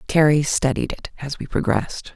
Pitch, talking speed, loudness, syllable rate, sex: 140 Hz, 165 wpm, -21 LUFS, 5.2 syllables/s, female